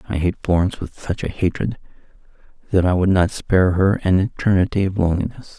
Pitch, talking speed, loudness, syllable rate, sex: 95 Hz, 185 wpm, -19 LUFS, 6.1 syllables/s, male